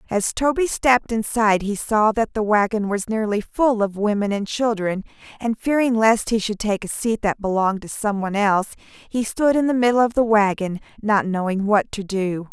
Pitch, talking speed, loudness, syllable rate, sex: 215 Hz, 205 wpm, -20 LUFS, 5.1 syllables/s, female